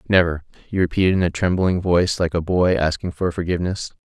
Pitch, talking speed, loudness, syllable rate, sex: 90 Hz, 195 wpm, -20 LUFS, 6.2 syllables/s, male